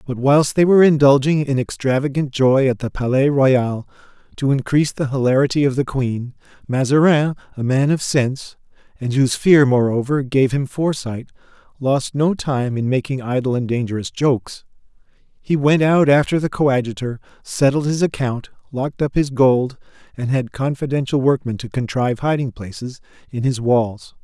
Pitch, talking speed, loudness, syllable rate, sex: 135 Hz, 160 wpm, -18 LUFS, 5.1 syllables/s, male